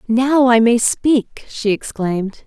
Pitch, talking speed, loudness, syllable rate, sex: 235 Hz, 145 wpm, -16 LUFS, 3.5 syllables/s, female